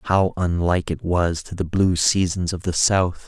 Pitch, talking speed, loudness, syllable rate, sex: 90 Hz, 200 wpm, -21 LUFS, 4.4 syllables/s, male